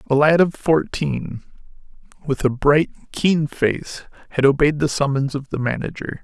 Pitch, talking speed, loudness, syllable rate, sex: 145 Hz, 155 wpm, -19 LUFS, 4.5 syllables/s, male